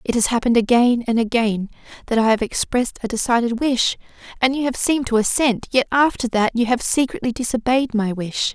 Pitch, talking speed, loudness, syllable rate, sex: 240 Hz, 195 wpm, -19 LUFS, 5.7 syllables/s, female